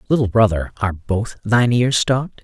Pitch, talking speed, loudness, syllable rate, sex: 110 Hz, 170 wpm, -18 LUFS, 5.6 syllables/s, male